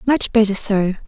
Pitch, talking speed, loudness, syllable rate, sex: 210 Hz, 170 wpm, -17 LUFS, 4.6 syllables/s, female